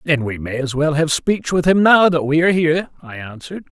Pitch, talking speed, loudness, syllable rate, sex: 155 Hz, 255 wpm, -16 LUFS, 5.7 syllables/s, male